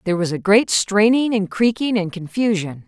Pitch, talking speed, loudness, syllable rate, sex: 205 Hz, 190 wpm, -18 LUFS, 5.1 syllables/s, female